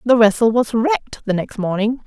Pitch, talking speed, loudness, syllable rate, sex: 225 Hz, 205 wpm, -17 LUFS, 5.3 syllables/s, female